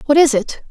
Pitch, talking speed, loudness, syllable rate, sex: 270 Hz, 255 wpm, -15 LUFS, 6.0 syllables/s, female